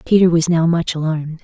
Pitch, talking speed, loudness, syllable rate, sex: 165 Hz, 210 wpm, -16 LUFS, 6.1 syllables/s, female